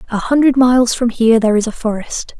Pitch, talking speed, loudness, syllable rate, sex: 235 Hz, 225 wpm, -14 LUFS, 6.5 syllables/s, female